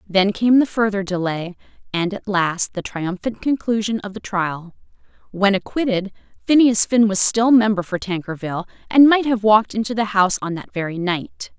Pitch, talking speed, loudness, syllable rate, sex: 205 Hz, 175 wpm, -19 LUFS, 5.0 syllables/s, female